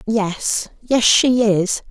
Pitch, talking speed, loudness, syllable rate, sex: 215 Hz, 125 wpm, -17 LUFS, 2.6 syllables/s, female